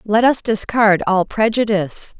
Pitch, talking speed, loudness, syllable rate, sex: 210 Hz, 135 wpm, -16 LUFS, 4.3 syllables/s, female